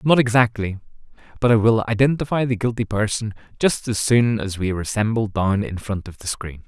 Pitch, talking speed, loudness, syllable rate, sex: 110 Hz, 200 wpm, -20 LUFS, 5.6 syllables/s, male